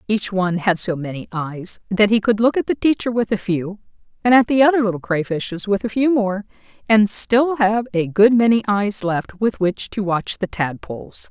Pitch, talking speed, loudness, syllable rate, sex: 200 Hz, 210 wpm, -18 LUFS, 5.0 syllables/s, female